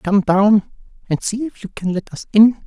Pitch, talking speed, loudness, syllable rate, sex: 195 Hz, 225 wpm, -17 LUFS, 4.5 syllables/s, male